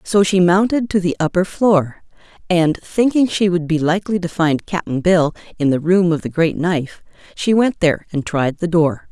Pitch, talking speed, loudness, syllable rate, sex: 175 Hz, 205 wpm, -17 LUFS, 4.8 syllables/s, female